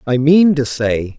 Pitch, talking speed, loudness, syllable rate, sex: 140 Hz, 200 wpm, -14 LUFS, 3.7 syllables/s, male